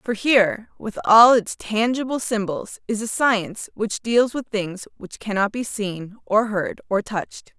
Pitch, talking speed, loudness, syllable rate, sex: 215 Hz, 175 wpm, -21 LUFS, 4.1 syllables/s, female